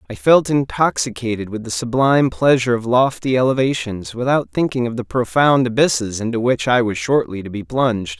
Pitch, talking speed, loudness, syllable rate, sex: 120 Hz, 175 wpm, -18 LUFS, 5.5 syllables/s, male